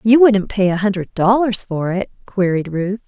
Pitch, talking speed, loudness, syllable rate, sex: 200 Hz, 195 wpm, -17 LUFS, 4.7 syllables/s, female